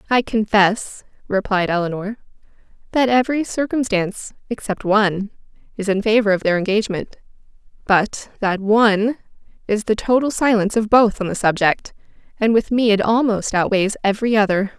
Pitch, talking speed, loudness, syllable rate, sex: 210 Hz, 140 wpm, -18 LUFS, 5.4 syllables/s, female